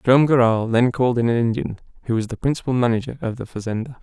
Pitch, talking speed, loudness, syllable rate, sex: 120 Hz, 225 wpm, -20 LUFS, 6.7 syllables/s, male